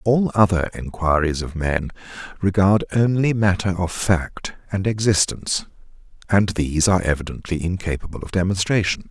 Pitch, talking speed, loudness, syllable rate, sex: 95 Hz, 125 wpm, -20 LUFS, 5.2 syllables/s, male